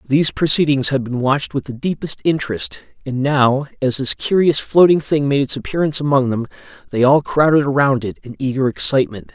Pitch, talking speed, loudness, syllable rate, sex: 140 Hz, 185 wpm, -17 LUFS, 5.7 syllables/s, male